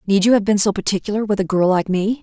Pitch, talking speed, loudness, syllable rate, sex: 200 Hz, 295 wpm, -17 LUFS, 6.6 syllables/s, female